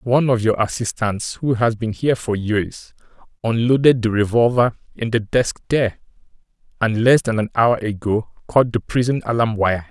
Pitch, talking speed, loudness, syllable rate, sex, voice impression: 115 Hz, 170 wpm, -19 LUFS, 4.9 syllables/s, male, masculine, middle-aged, slightly relaxed, slightly powerful, muffled, halting, raspy, calm, slightly mature, friendly, wild, slightly modest